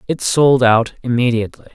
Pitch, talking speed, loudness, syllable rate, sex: 120 Hz, 140 wpm, -15 LUFS, 5.5 syllables/s, male